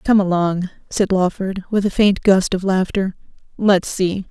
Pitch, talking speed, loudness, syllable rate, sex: 190 Hz, 165 wpm, -18 LUFS, 4.3 syllables/s, female